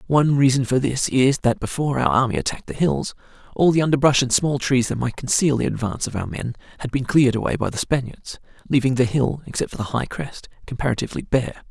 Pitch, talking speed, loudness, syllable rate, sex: 130 Hz, 220 wpm, -21 LUFS, 6.4 syllables/s, male